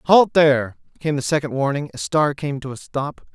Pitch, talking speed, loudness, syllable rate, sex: 145 Hz, 215 wpm, -20 LUFS, 5.4 syllables/s, male